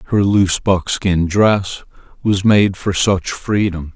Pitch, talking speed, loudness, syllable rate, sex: 95 Hz, 135 wpm, -16 LUFS, 3.4 syllables/s, male